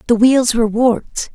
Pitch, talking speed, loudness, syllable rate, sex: 235 Hz, 180 wpm, -14 LUFS, 5.2 syllables/s, female